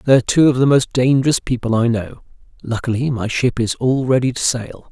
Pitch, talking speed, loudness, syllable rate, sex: 125 Hz, 210 wpm, -17 LUFS, 5.6 syllables/s, male